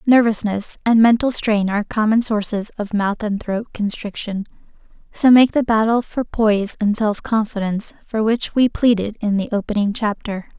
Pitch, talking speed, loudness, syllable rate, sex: 215 Hz, 165 wpm, -18 LUFS, 4.9 syllables/s, female